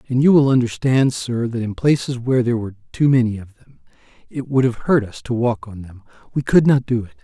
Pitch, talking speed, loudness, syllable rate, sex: 125 Hz, 240 wpm, -18 LUFS, 6.0 syllables/s, male